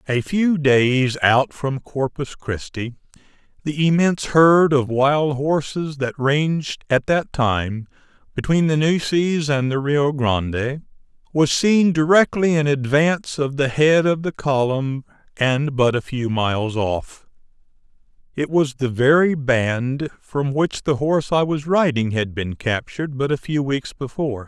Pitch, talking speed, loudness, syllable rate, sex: 140 Hz, 150 wpm, -19 LUFS, 4.0 syllables/s, male